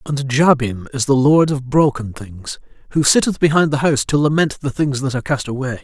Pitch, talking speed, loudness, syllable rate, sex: 135 Hz, 215 wpm, -16 LUFS, 5.5 syllables/s, male